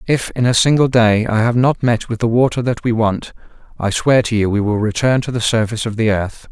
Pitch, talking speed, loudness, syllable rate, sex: 115 Hz, 260 wpm, -16 LUFS, 5.6 syllables/s, male